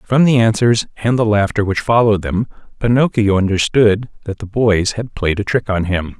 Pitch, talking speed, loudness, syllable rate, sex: 105 Hz, 195 wpm, -15 LUFS, 5.1 syllables/s, male